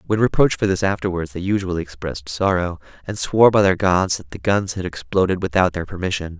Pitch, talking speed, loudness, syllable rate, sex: 90 Hz, 205 wpm, -20 LUFS, 6.2 syllables/s, male